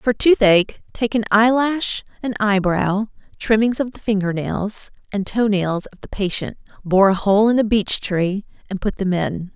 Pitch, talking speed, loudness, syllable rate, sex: 205 Hz, 180 wpm, -19 LUFS, 4.4 syllables/s, female